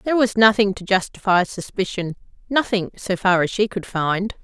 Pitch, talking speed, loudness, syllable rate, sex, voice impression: 200 Hz, 175 wpm, -20 LUFS, 5.1 syllables/s, female, feminine, middle-aged, tensed, bright, clear, fluent, intellectual, slightly friendly, unique, elegant, lively, slightly sharp